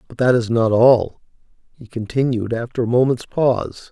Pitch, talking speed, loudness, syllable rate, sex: 120 Hz, 170 wpm, -18 LUFS, 5.0 syllables/s, male